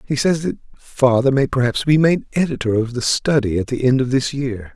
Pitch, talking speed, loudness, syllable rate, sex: 130 Hz, 225 wpm, -18 LUFS, 5.2 syllables/s, male